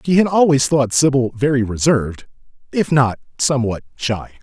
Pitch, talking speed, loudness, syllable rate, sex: 130 Hz, 150 wpm, -17 LUFS, 5.3 syllables/s, male